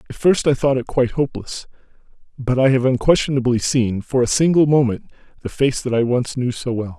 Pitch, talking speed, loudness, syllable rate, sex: 130 Hz, 205 wpm, -18 LUFS, 5.8 syllables/s, male